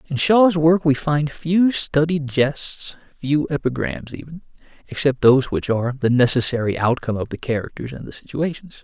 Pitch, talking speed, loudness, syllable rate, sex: 145 Hz, 165 wpm, -19 LUFS, 5.0 syllables/s, male